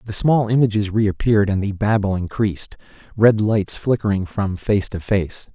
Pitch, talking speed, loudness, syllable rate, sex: 105 Hz, 160 wpm, -19 LUFS, 4.8 syllables/s, male